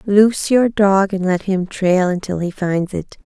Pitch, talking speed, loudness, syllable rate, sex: 195 Hz, 200 wpm, -17 LUFS, 4.2 syllables/s, female